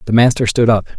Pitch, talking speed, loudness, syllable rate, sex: 115 Hz, 245 wpm, -14 LUFS, 6.9 syllables/s, male